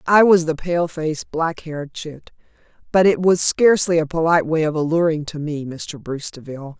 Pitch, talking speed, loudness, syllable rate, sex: 160 Hz, 195 wpm, -19 LUFS, 5.4 syllables/s, female